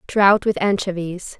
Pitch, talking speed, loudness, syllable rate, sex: 190 Hz, 130 wpm, -19 LUFS, 4.0 syllables/s, female